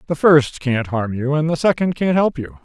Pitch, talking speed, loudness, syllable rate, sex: 145 Hz, 250 wpm, -18 LUFS, 4.9 syllables/s, male